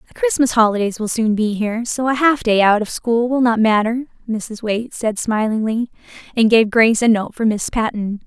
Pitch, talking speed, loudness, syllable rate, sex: 225 Hz, 210 wpm, -17 LUFS, 5.3 syllables/s, female